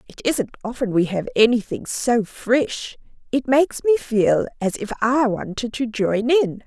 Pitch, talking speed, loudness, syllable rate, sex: 230 Hz, 170 wpm, -20 LUFS, 4.2 syllables/s, female